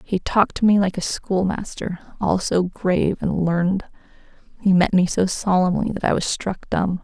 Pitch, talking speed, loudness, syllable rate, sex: 185 Hz, 190 wpm, -21 LUFS, 4.8 syllables/s, female